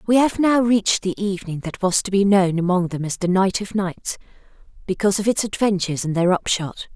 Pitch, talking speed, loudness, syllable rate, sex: 195 Hz, 215 wpm, -20 LUFS, 5.8 syllables/s, female